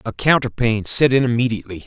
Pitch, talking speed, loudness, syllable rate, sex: 120 Hz, 195 wpm, -17 LUFS, 6.2 syllables/s, male